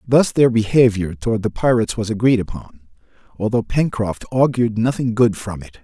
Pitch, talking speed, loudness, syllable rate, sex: 110 Hz, 165 wpm, -18 LUFS, 5.5 syllables/s, male